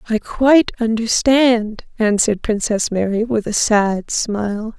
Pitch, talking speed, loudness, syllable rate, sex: 220 Hz, 125 wpm, -17 LUFS, 4.1 syllables/s, female